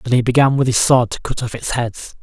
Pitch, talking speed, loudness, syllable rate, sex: 125 Hz, 295 wpm, -17 LUFS, 5.8 syllables/s, male